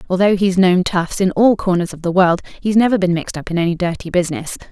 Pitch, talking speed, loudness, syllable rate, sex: 185 Hz, 240 wpm, -16 LUFS, 6.4 syllables/s, female